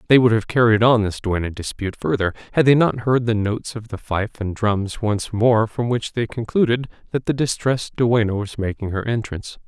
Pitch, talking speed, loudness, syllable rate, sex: 110 Hz, 210 wpm, -20 LUFS, 5.4 syllables/s, male